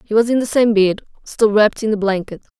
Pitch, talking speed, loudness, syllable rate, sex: 210 Hz, 255 wpm, -16 LUFS, 6.1 syllables/s, female